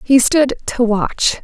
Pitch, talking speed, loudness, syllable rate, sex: 245 Hz, 165 wpm, -15 LUFS, 3.3 syllables/s, female